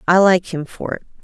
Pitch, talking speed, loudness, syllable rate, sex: 180 Hz, 245 wpm, -18 LUFS, 5.5 syllables/s, female